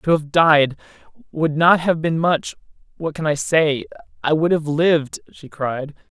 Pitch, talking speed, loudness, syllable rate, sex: 155 Hz, 155 wpm, -18 LUFS, 4.2 syllables/s, male